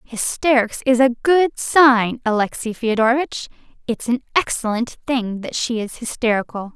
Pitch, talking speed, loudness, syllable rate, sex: 240 Hz, 135 wpm, -19 LUFS, 4.6 syllables/s, female